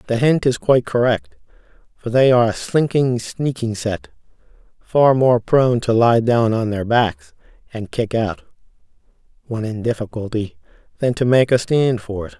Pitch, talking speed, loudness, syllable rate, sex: 120 Hz, 165 wpm, -18 LUFS, 4.7 syllables/s, male